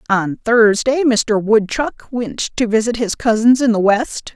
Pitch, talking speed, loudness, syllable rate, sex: 225 Hz, 165 wpm, -16 LUFS, 4.0 syllables/s, female